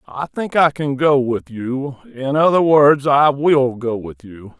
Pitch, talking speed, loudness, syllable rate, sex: 135 Hz, 195 wpm, -16 LUFS, 3.8 syllables/s, male